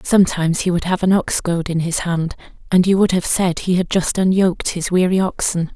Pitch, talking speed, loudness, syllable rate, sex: 180 Hz, 230 wpm, -17 LUFS, 5.5 syllables/s, female